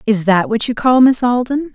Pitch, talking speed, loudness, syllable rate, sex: 235 Hz, 240 wpm, -14 LUFS, 5.0 syllables/s, female